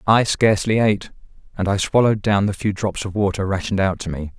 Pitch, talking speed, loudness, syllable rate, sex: 100 Hz, 220 wpm, -19 LUFS, 6.4 syllables/s, male